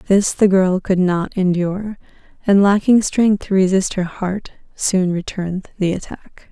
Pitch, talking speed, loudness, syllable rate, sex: 190 Hz, 165 wpm, -17 LUFS, 4.5 syllables/s, female